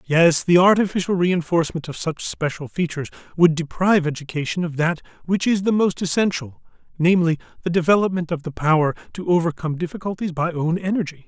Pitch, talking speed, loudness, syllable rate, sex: 170 Hz, 160 wpm, -20 LUFS, 6.1 syllables/s, male